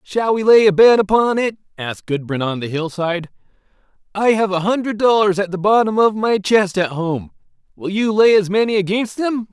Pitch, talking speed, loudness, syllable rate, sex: 200 Hz, 210 wpm, -16 LUFS, 5.2 syllables/s, male